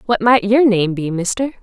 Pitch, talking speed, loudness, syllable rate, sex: 215 Hz, 220 wpm, -15 LUFS, 5.0 syllables/s, female